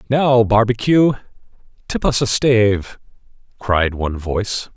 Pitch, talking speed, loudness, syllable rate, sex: 110 Hz, 115 wpm, -17 LUFS, 4.3 syllables/s, male